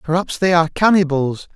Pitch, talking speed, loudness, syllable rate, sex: 165 Hz, 155 wpm, -16 LUFS, 5.9 syllables/s, male